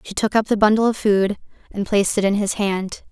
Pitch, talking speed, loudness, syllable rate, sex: 205 Hz, 250 wpm, -19 LUFS, 5.6 syllables/s, female